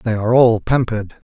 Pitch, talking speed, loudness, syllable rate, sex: 115 Hz, 185 wpm, -16 LUFS, 6.4 syllables/s, male